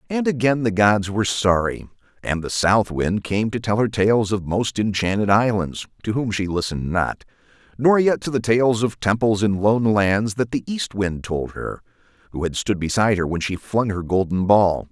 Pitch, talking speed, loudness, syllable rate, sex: 105 Hz, 205 wpm, -20 LUFS, 4.8 syllables/s, male